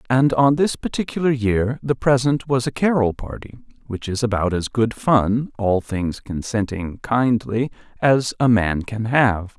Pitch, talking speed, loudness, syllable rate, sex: 120 Hz, 155 wpm, -20 LUFS, 4.1 syllables/s, male